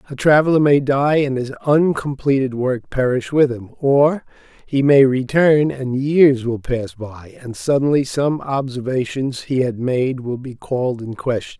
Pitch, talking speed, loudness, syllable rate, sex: 135 Hz, 165 wpm, -18 LUFS, 4.3 syllables/s, male